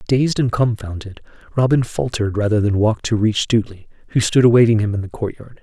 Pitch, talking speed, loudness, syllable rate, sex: 110 Hz, 190 wpm, -18 LUFS, 6.2 syllables/s, male